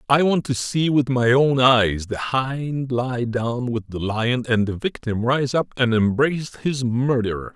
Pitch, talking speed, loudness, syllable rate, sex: 125 Hz, 190 wpm, -21 LUFS, 4.1 syllables/s, male